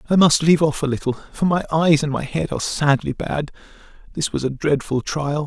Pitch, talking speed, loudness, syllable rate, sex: 150 Hz, 210 wpm, -20 LUFS, 5.5 syllables/s, male